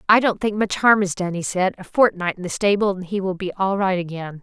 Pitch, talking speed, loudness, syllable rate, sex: 190 Hz, 285 wpm, -20 LUFS, 5.7 syllables/s, female